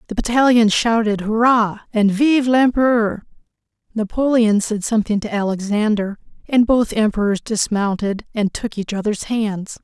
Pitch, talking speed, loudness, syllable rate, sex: 220 Hz, 130 wpm, -18 LUFS, 4.6 syllables/s, female